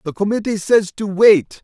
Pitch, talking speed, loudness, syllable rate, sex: 200 Hz, 185 wpm, -16 LUFS, 4.6 syllables/s, male